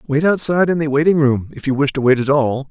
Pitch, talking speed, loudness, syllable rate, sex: 145 Hz, 290 wpm, -16 LUFS, 6.4 syllables/s, male